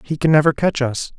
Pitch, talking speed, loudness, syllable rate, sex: 145 Hz, 255 wpm, -17 LUFS, 5.7 syllables/s, male